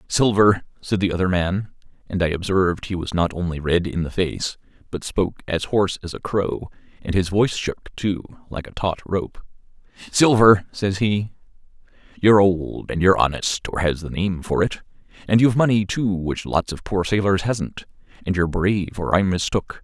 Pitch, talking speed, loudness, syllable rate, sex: 95 Hz, 180 wpm, -21 LUFS, 5.1 syllables/s, male